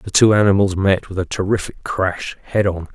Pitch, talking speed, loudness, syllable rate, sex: 95 Hz, 205 wpm, -18 LUFS, 5.2 syllables/s, male